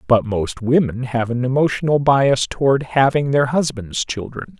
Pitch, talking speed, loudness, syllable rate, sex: 130 Hz, 155 wpm, -18 LUFS, 4.5 syllables/s, male